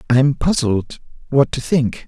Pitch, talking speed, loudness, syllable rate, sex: 130 Hz, 175 wpm, -18 LUFS, 4.4 syllables/s, male